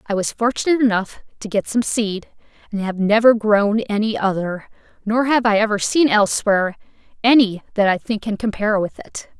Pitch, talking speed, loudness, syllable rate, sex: 215 Hz, 180 wpm, -18 LUFS, 5.4 syllables/s, female